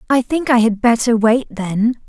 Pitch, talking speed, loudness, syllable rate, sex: 235 Hz, 200 wpm, -16 LUFS, 4.6 syllables/s, female